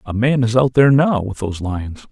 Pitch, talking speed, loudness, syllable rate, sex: 115 Hz, 255 wpm, -16 LUFS, 5.5 syllables/s, male